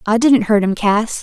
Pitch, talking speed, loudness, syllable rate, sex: 220 Hz, 245 wpm, -14 LUFS, 4.6 syllables/s, female